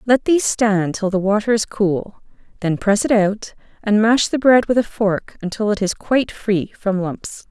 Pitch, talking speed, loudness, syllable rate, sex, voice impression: 210 Hz, 210 wpm, -18 LUFS, 4.6 syllables/s, female, feminine, adult-like, tensed, slightly powerful, soft, raspy, intellectual, calm, friendly, reassuring, elegant, slightly lively, kind